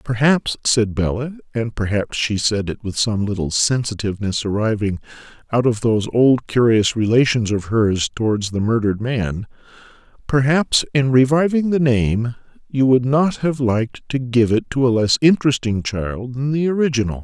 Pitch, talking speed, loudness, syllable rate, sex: 120 Hz, 160 wpm, -18 LUFS, 4.9 syllables/s, male